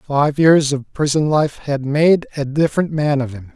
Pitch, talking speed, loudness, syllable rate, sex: 145 Hz, 200 wpm, -17 LUFS, 4.4 syllables/s, male